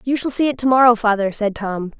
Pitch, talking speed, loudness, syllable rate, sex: 230 Hz, 270 wpm, -17 LUFS, 5.9 syllables/s, female